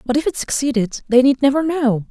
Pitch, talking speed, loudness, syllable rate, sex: 265 Hz, 230 wpm, -17 LUFS, 5.7 syllables/s, female